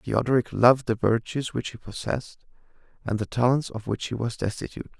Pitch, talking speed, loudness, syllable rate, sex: 120 Hz, 180 wpm, -25 LUFS, 6.1 syllables/s, male